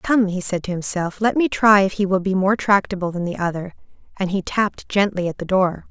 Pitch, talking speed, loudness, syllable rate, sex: 190 Hz, 245 wpm, -20 LUFS, 5.5 syllables/s, female